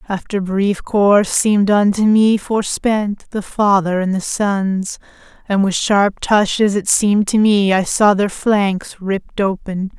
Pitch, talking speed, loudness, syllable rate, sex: 200 Hz, 155 wpm, -16 LUFS, 4.0 syllables/s, female